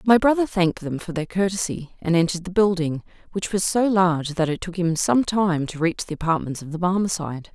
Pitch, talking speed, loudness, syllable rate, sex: 180 Hz, 225 wpm, -22 LUFS, 5.8 syllables/s, female